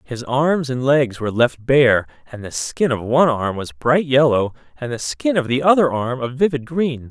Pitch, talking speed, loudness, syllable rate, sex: 130 Hz, 220 wpm, -18 LUFS, 4.7 syllables/s, male